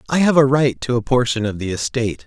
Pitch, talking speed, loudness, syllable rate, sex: 120 Hz, 265 wpm, -18 LUFS, 6.2 syllables/s, male